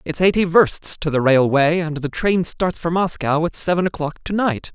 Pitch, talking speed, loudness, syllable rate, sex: 165 Hz, 215 wpm, -19 LUFS, 4.7 syllables/s, male